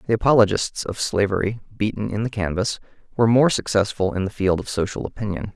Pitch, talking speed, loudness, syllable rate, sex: 105 Hz, 185 wpm, -21 LUFS, 6.1 syllables/s, male